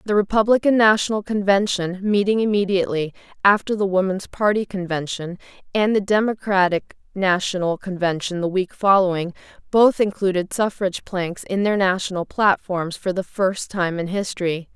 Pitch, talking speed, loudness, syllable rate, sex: 195 Hz, 135 wpm, -20 LUFS, 5.1 syllables/s, female